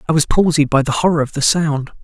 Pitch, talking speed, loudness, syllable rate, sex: 150 Hz, 265 wpm, -15 LUFS, 6.3 syllables/s, male